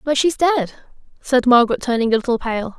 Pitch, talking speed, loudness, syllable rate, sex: 255 Hz, 195 wpm, -17 LUFS, 5.5 syllables/s, female